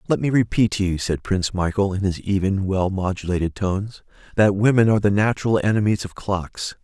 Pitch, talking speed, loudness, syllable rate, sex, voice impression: 100 Hz, 195 wpm, -21 LUFS, 5.7 syllables/s, male, very masculine, very adult-like, middle-aged, very thick, slightly tensed, powerful, slightly dark, slightly hard, muffled, fluent, cool, very intellectual, sincere, very calm, friendly, very reassuring, slightly elegant, very wild, sweet, kind, slightly modest